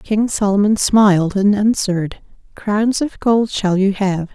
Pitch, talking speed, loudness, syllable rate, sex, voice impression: 205 Hz, 150 wpm, -16 LUFS, 4.0 syllables/s, female, feminine, adult-like, thin, relaxed, weak, soft, muffled, slightly raspy, calm, reassuring, elegant, kind, modest